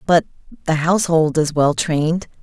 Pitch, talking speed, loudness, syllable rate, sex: 160 Hz, 150 wpm, -17 LUFS, 5.1 syllables/s, female